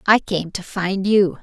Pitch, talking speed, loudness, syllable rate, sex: 195 Hz, 210 wpm, -20 LUFS, 3.9 syllables/s, female